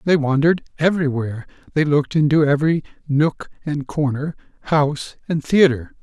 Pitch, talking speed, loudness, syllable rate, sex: 150 Hz, 130 wpm, -19 LUFS, 5.7 syllables/s, male